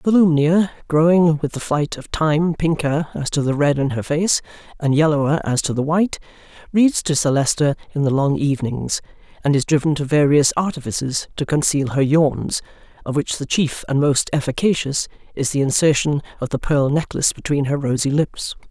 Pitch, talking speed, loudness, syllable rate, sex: 150 Hz, 185 wpm, -19 LUFS, 5.3 syllables/s, female